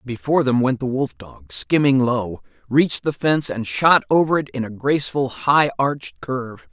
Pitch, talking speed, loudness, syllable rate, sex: 130 Hz, 190 wpm, -19 LUFS, 5.0 syllables/s, male